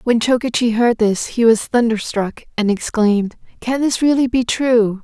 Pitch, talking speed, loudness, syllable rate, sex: 230 Hz, 165 wpm, -17 LUFS, 4.6 syllables/s, female